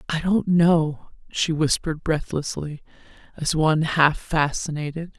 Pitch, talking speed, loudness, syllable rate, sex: 155 Hz, 115 wpm, -22 LUFS, 4.2 syllables/s, female